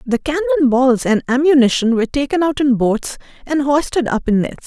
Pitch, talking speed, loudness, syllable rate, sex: 270 Hz, 195 wpm, -16 LUFS, 5.7 syllables/s, female